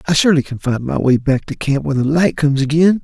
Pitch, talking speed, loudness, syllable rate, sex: 140 Hz, 275 wpm, -16 LUFS, 6.3 syllables/s, male